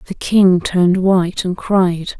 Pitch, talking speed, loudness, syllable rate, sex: 185 Hz, 165 wpm, -15 LUFS, 4.0 syllables/s, female